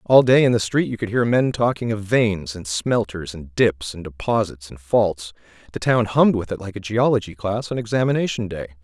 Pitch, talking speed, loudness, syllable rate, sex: 105 Hz, 210 wpm, -21 LUFS, 5.3 syllables/s, male